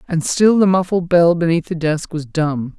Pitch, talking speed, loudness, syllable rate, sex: 170 Hz, 215 wpm, -16 LUFS, 4.6 syllables/s, female